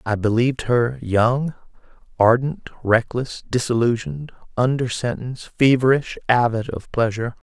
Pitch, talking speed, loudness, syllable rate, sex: 120 Hz, 105 wpm, -20 LUFS, 4.7 syllables/s, male